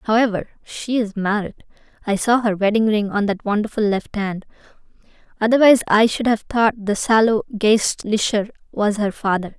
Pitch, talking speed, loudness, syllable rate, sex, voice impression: 215 Hz, 155 wpm, -19 LUFS, 5.0 syllables/s, female, feminine, gender-neutral, very young, very thin, tensed, slightly powerful, very bright, soft, very clear, fluent, cute, slightly intellectual, very refreshing, sincere, slightly calm, friendly, reassuring, very unique, elegant, slightly sweet, very lively, slightly strict, slightly sharp, slightly modest